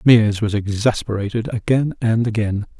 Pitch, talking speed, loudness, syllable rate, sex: 110 Hz, 130 wpm, -19 LUFS, 5.0 syllables/s, male